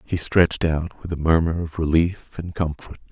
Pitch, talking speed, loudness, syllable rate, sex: 80 Hz, 195 wpm, -22 LUFS, 4.9 syllables/s, male